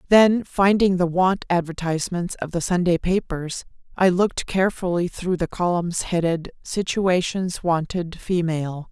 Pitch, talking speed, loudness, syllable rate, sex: 175 Hz, 130 wpm, -22 LUFS, 4.5 syllables/s, female